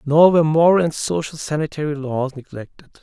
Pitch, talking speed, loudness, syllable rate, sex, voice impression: 150 Hz, 160 wpm, -18 LUFS, 5.7 syllables/s, male, masculine, adult-like, slightly weak, muffled, halting, slightly refreshing, friendly, unique, slightly kind, modest